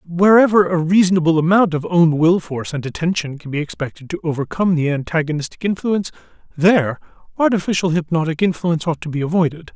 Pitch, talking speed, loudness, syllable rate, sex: 170 Hz, 160 wpm, -17 LUFS, 6.3 syllables/s, male